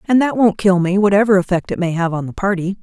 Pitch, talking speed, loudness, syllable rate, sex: 190 Hz, 275 wpm, -16 LUFS, 6.4 syllables/s, female